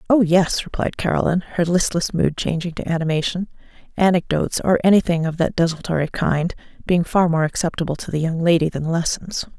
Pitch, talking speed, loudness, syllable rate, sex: 170 Hz, 170 wpm, -20 LUFS, 5.7 syllables/s, female